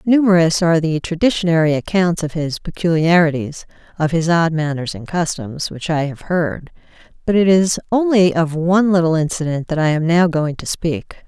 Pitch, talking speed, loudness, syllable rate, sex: 165 Hz, 165 wpm, -17 LUFS, 5.1 syllables/s, female